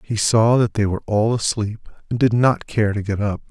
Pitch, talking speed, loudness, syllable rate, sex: 110 Hz, 240 wpm, -19 LUFS, 5.1 syllables/s, male